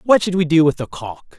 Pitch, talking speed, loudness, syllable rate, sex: 165 Hz, 305 wpm, -17 LUFS, 5.4 syllables/s, male